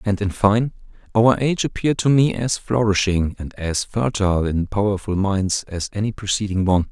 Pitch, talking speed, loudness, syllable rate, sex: 105 Hz, 175 wpm, -20 LUFS, 5.2 syllables/s, male